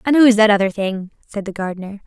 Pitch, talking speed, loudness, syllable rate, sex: 210 Hz, 230 wpm, -16 LUFS, 6.1 syllables/s, female